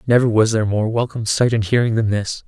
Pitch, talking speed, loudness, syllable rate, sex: 110 Hz, 245 wpm, -18 LUFS, 6.4 syllables/s, male